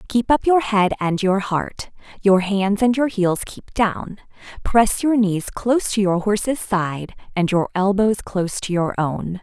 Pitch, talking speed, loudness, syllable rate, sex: 200 Hz, 185 wpm, -19 LUFS, 4.1 syllables/s, female